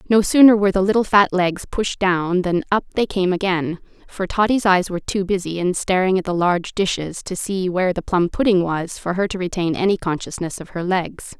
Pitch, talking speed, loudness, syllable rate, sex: 185 Hz, 220 wpm, -19 LUFS, 5.4 syllables/s, female